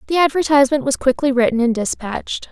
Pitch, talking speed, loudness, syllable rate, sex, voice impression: 265 Hz, 165 wpm, -17 LUFS, 6.5 syllables/s, female, very feminine, young, thin, tensed, slightly powerful, slightly bright, soft, slightly clear, fluent, raspy, cute, very intellectual, refreshing, sincere, calm, friendly, reassuring, unique, slightly elegant, wild, slightly sweet, lively, slightly kind, slightly intense, light